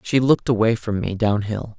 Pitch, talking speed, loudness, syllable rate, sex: 110 Hz, 200 wpm, -20 LUFS, 5.3 syllables/s, male